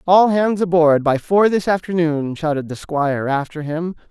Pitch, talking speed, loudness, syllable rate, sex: 165 Hz, 175 wpm, -18 LUFS, 4.7 syllables/s, male